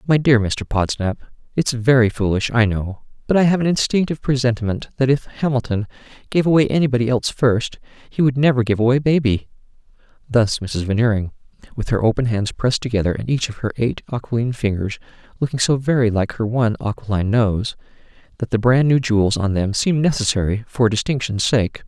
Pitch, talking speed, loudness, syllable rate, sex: 120 Hz, 180 wpm, -19 LUFS, 5.9 syllables/s, male